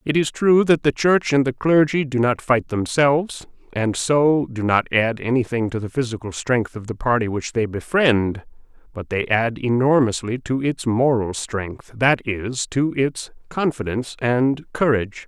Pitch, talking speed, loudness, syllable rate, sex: 125 Hz, 175 wpm, -20 LUFS, 4.4 syllables/s, male